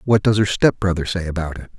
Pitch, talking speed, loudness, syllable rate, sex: 95 Hz, 235 wpm, -19 LUFS, 6.3 syllables/s, male